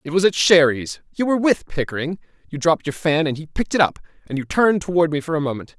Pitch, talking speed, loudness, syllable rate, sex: 160 Hz, 250 wpm, -20 LUFS, 6.9 syllables/s, male